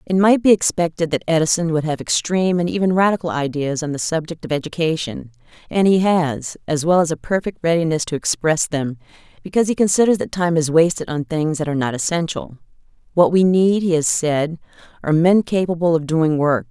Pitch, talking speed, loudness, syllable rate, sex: 165 Hz, 195 wpm, -18 LUFS, 5.8 syllables/s, female